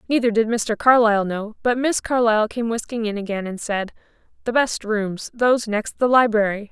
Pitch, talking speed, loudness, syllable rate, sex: 225 Hz, 190 wpm, -20 LUFS, 5.2 syllables/s, female